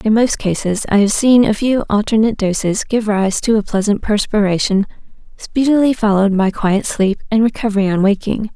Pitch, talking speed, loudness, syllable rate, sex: 210 Hz, 175 wpm, -15 LUFS, 5.4 syllables/s, female